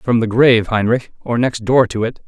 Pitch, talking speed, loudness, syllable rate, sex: 115 Hz, 235 wpm, -15 LUFS, 5.1 syllables/s, male